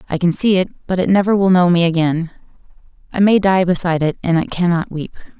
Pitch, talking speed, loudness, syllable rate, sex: 175 Hz, 225 wpm, -16 LUFS, 6.4 syllables/s, female